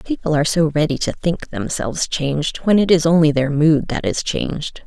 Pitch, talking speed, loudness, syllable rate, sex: 160 Hz, 210 wpm, -18 LUFS, 5.5 syllables/s, female